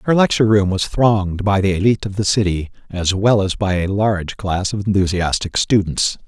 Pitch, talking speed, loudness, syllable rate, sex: 100 Hz, 200 wpm, -17 LUFS, 5.4 syllables/s, male